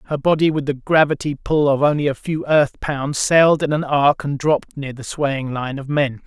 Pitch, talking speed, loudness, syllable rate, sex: 145 Hz, 230 wpm, -18 LUFS, 5.0 syllables/s, male